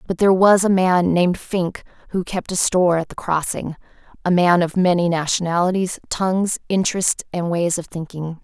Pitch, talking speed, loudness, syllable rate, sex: 180 Hz, 170 wpm, -19 LUFS, 5.3 syllables/s, female